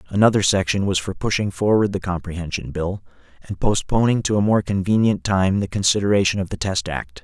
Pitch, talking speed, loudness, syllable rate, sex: 100 Hz, 185 wpm, -20 LUFS, 5.7 syllables/s, male